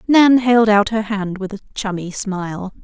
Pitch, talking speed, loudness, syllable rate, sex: 210 Hz, 190 wpm, -17 LUFS, 4.5 syllables/s, female